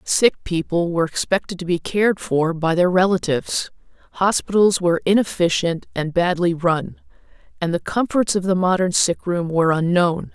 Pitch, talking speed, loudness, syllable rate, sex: 180 Hz, 150 wpm, -19 LUFS, 5.1 syllables/s, female